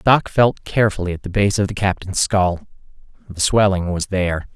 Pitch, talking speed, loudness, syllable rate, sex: 95 Hz, 185 wpm, -18 LUFS, 5.3 syllables/s, male